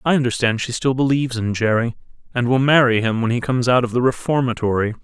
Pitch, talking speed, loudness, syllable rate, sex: 120 Hz, 215 wpm, -18 LUFS, 6.5 syllables/s, male